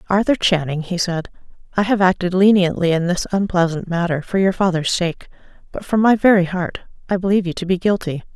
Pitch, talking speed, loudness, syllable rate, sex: 180 Hz, 195 wpm, -18 LUFS, 5.9 syllables/s, female